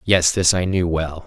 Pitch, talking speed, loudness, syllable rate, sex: 90 Hz, 240 wpm, -18 LUFS, 4.4 syllables/s, male